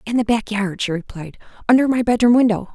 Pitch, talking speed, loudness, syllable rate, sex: 220 Hz, 220 wpm, -18 LUFS, 6.1 syllables/s, female